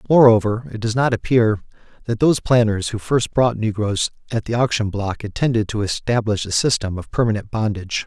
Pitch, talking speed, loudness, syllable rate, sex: 110 Hz, 180 wpm, -19 LUFS, 5.6 syllables/s, male